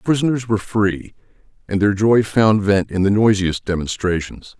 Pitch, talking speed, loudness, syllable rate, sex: 105 Hz, 170 wpm, -18 LUFS, 5.1 syllables/s, male